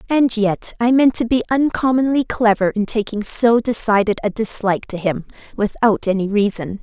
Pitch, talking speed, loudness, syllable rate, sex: 220 Hz, 165 wpm, -17 LUFS, 5.0 syllables/s, female